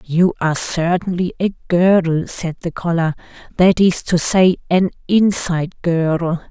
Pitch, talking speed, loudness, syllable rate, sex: 175 Hz, 140 wpm, -17 LUFS, 4.2 syllables/s, female